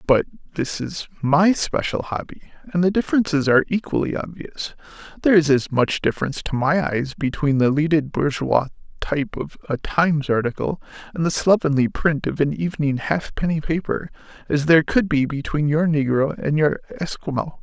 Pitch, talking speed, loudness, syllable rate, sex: 155 Hz, 165 wpm, -21 LUFS, 5.3 syllables/s, male